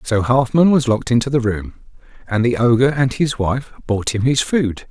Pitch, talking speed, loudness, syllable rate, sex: 125 Hz, 210 wpm, -17 LUFS, 5.1 syllables/s, male